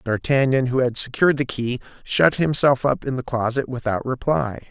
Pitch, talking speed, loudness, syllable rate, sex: 130 Hz, 180 wpm, -21 LUFS, 5.1 syllables/s, male